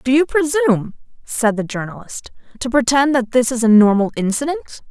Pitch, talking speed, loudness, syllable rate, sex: 245 Hz, 170 wpm, -16 LUFS, 5.8 syllables/s, female